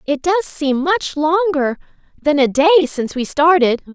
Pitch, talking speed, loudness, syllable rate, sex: 305 Hz, 165 wpm, -16 LUFS, 4.4 syllables/s, female